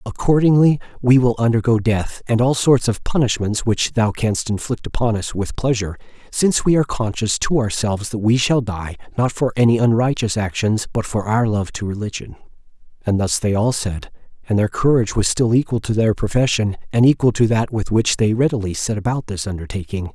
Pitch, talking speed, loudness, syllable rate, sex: 115 Hz, 195 wpm, -18 LUFS, 5.5 syllables/s, male